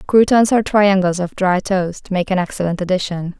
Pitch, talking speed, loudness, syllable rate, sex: 190 Hz, 175 wpm, -16 LUFS, 4.9 syllables/s, female